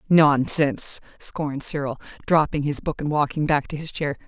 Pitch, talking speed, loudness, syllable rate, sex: 150 Hz, 170 wpm, -22 LUFS, 5.0 syllables/s, female